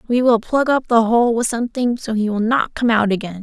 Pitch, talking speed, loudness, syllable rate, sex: 230 Hz, 265 wpm, -17 LUFS, 5.5 syllables/s, female